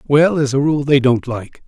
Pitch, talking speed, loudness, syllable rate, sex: 140 Hz, 250 wpm, -15 LUFS, 4.6 syllables/s, male